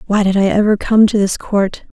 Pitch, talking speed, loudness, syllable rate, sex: 205 Hz, 240 wpm, -14 LUFS, 5.2 syllables/s, female